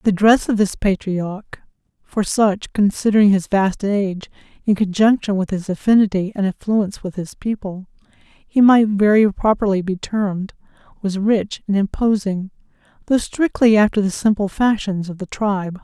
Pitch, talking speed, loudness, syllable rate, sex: 205 Hz, 145 wpm, -18 LUFS, 4.7 syllables/s, female